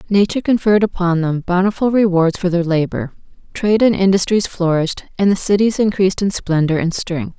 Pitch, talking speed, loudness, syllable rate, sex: 185 Hz, 170 wpm, -16 LUFS, 5.9 syllables/s, female